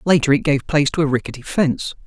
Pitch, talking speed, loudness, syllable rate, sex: 145 Hz, 230 wpm, -18 LUFS, 7.0 syllables/s, male